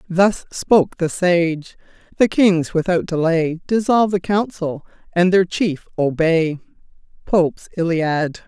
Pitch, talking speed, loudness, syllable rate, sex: 175 Hz, 120 wpm, -18 LUFS, 4.0 syllables/s, female